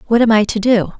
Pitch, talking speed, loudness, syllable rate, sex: 215 Hz, 305 wpm, -14 LUFS, 6.4 syllables/s, female